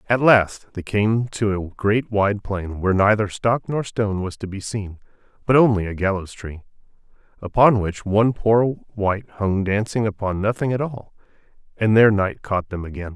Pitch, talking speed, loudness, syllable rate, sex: 105 Hz, 180 wpm, -20 LUFS, 4.8 syllables/s, male